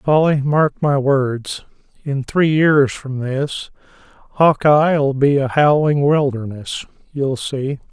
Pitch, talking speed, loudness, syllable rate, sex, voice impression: 140 Hz, 115 wpm, -17 LUFS, 3.3 syllables/s, male, masculine, slightly middle-aged, soft, slightly muffled, slightly calm, friendly, slightly reassuring, slightly elegant